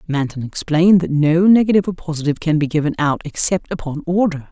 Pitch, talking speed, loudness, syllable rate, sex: 165 Hz, 185 wpm, -17 LUFS, 6.4 syllables/s, female